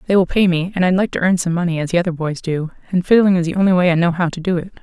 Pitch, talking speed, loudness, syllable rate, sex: 175 Hz, 350 wpm, -17 LUFS, 7.3 syllables/s, female